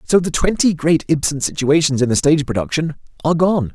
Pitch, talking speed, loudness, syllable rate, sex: 150 Hz, 190 wpm, -17 LUFS, 6.1 syllables/s, male